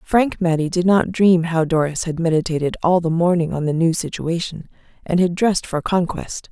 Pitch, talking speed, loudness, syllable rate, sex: 170 Hz, 195 wpm, -19 LUFS, 5.2 syllables/s, female